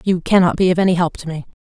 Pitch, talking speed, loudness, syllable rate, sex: 175 Hz, 295 wpm, -16 LUFS, 7.3 syllables/s, female